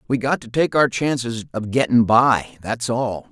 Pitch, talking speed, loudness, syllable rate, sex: 120 Hz, 200 wpm, -19 LUFS, 4.3 syllables/s, male